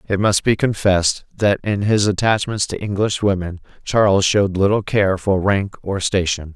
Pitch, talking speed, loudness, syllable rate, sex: 100 Hz, 175 wpm, -18 LUFS, 4.8 syllables/s, male